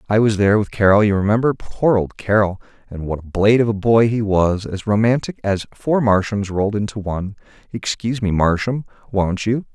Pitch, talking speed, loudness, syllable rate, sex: 105 Hz, 185 wpm, -18 LUFS, 5.5 syllables/s, male